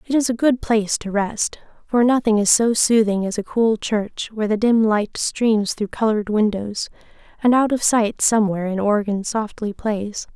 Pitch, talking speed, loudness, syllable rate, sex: 215 Hz, 190 wpm, -19 LUFS, 4.8 syllables/s, female